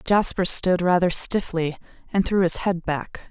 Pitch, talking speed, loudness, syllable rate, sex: 180 Hz, 165 wpm, -21 LUFS, 4.1 syllables/s, female